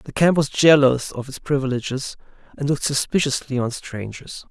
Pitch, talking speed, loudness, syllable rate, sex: 135 Hz, 160 wpm, -20 LUFS, 5.2 syllables/s, male